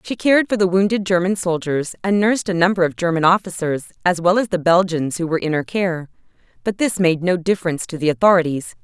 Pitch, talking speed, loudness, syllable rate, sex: 180 Hz, 215 wpm, -18 LUFS, 6.2 syllables/s, female